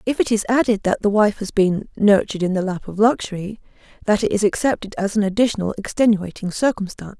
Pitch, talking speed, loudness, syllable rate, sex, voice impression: 205 Hz, 190 wpm, -19 LUFS, 6.0 syllables/s, female, feminine, adult-like, tensed, powerful, hard, clear, slightly raspy, intellectual, calm, elegant, strict, sharp